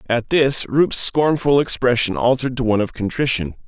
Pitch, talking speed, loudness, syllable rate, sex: 125 Hz, 165 wpm, -17 LUFS, 5.6 syllables/s, male